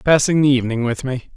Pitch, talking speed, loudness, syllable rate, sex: 130 Hz, 220 wpm, -17 LUFS, 6.5 syllables/s, male